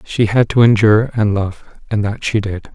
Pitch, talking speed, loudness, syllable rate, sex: 105 Hz, 220 wpm, -15 LUFS, 4.9 syllables/s, male